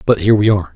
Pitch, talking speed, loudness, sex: 100 Hz, 320 wpm, -13 LUFS, male